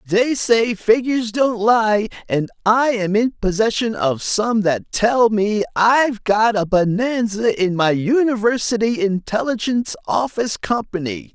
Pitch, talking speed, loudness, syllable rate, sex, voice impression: 215 Hz, 130 wpm, -18 LUFS, 4.1 syllables/s, male, masculine, middle-aged, tensed, powerful, bright, halting, friendly, unique, slightly wild, lively, intense